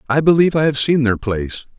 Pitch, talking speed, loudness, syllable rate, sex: 135 Hz, 235 wpm, -16 LUFS, 6.6 syllables/s, male